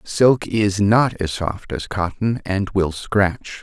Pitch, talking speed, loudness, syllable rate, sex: 100 Hz, 165 wpm, -20 LUFS, 3.2 syllables/s, male